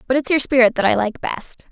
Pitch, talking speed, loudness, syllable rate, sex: 250 Hz, 280 wpm, -17 LUFS, 5.8 syllables/s, female